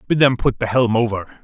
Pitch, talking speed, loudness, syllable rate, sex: 120 Hz, 250 wpm, -18 LUFS, 6.2 syllables/s, male